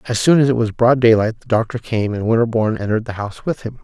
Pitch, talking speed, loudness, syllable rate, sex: 115 Hz, 265 wpm, -17 LUFS, 6.9 syllables/s, male